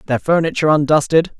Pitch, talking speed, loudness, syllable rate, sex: 155 Hz, 130 wpm, -15 LUFS, 6.7 syllables/s, male